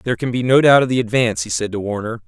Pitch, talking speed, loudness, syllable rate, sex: 115 Hz, 315 wpm, -17 LUFS, 7.5 syllables/s, male